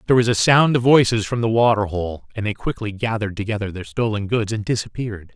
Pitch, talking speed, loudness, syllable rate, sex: 110 Hz, 225 wpm, -20 LUFS, 6.5 syllables/s, male